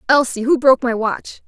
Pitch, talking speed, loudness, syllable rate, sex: 250 Hz, 205 wpm, -16 LUFS, 5.5 syllables/s, female